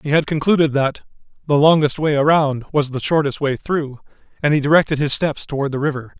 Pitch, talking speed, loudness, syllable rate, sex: 145 Hz, 205 wpm, -18 LUFS, 5.8 syllables/s, male